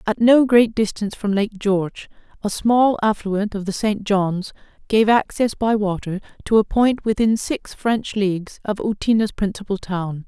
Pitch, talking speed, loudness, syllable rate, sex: 210 Hz, 170 wpm, -20 LUFS, 4.5 syllables/s, female